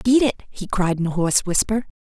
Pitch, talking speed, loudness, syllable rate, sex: 200 Hz, 235 wpm, -21 LUFS, 5.7 syllables/s, female